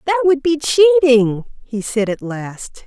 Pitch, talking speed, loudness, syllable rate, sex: 250 Hz, 165 wpm, -15 LUFS, 3.7 syllables/s, female